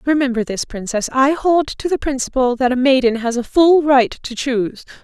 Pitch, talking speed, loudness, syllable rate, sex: 260 Hz, 205 wpm, -17 LUFS, 5.1 syllables/s, female